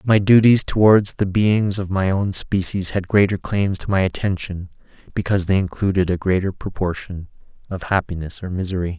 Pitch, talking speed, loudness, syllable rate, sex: 95 Hz, 165 wpm, -19 LUFS, 5.2 syllables/s, male